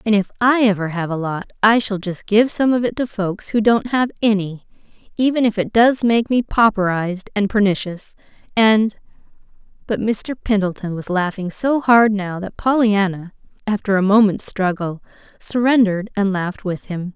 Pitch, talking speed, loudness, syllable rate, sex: 205 Hz, 170 wpm, -18 LUFS, 4.9 syllables/s, female